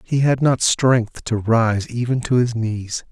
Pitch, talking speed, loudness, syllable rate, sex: 120 Hz, 195 wpm, -19 LUFS, 3.7 syllables/s, male